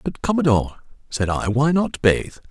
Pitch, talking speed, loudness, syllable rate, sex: 130 Hz, 170 wpm, -20 LUFS, 4.9 syllables/s, male